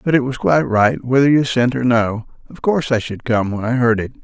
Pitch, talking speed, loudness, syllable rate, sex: 125 Hz, 270 wpm, -17 LUFS, 5.7 syllables/s, male